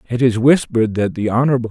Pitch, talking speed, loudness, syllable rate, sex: 120 Hz, 210 wpm, -16 LUFS, 7.0 syllables/s, male